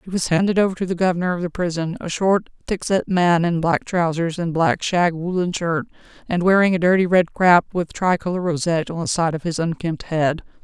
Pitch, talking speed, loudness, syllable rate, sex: 175 Hz, 220 wpm, -20 LUFS, 5.4 syllables/s, female